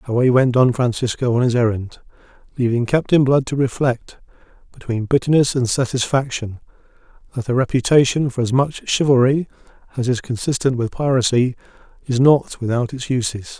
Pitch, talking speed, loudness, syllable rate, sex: 125 Hz, 145 wpm, -18 LUFS, 5.4 syllables/s, male